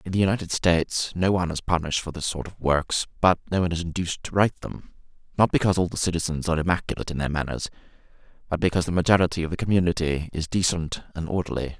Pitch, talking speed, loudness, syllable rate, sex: 85 Hz, 215 wpm, -24 LUFS, 7.3 syllables/s, male